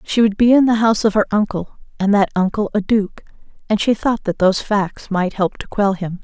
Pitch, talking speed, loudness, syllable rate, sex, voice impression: 205 Hz, 240 wpm, -17 LUFS, 5.5 syllables/s, female, feminine, adult-like, sincere, slightly calm, slightly reassuring, slightly elegant